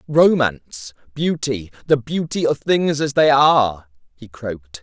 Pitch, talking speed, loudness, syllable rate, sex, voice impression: 130 Hz, 110 wpm, -18 LUFS, 4.2 syllables/s, male, masculine, adult-like, slightly middle-aged, slightly thick, slightly tensed, slightly powerful, bright, slightly hard, clear, fluent, cool, intellectual, slightly refreshing, sincere, calm, slightly friendly, reassuring, slightly wild, slightly sweet, kind